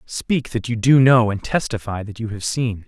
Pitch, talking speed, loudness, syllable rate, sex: 115 Hz, 230 wpm, -19 LUFS, 4.7 syllables/s, male